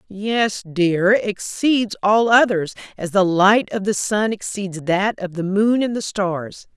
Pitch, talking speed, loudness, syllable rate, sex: 200 Hz, 170 wpm, -19 LUFS, 3.6 syllables/s, female